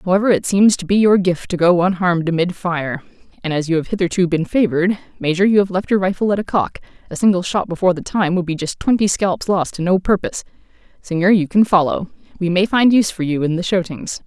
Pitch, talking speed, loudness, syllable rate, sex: 185 Hz, 225 wpm, -17 LUFS, 6.2 syllables/s, female